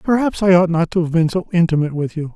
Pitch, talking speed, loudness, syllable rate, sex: 170 Hz, 280 wpm, -17 LUFS, 6.8 syllables/s, male